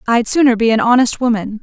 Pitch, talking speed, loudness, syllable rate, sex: 230 Hz, 220 wpm, -13 LUFS, 6.1 syllables/s, female